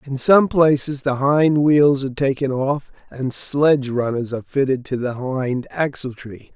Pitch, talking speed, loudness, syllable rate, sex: 135 Hz, 165 wpm, -19 LUFS, 4.3 syllables/s, male